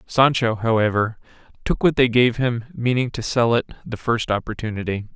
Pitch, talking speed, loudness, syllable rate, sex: 115 Hz, 165 wpm, -20 LUFS, 5.1 syllables/s, male